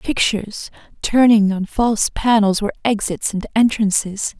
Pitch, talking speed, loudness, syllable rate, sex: 215 Hz, 125 wpm, -17 LUFS, 4.8 syllables/s, female